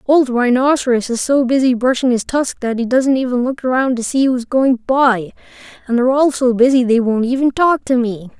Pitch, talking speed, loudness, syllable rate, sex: 250 Hz, 215 wpm, -15 LUFS, 5.2 syllables/s, female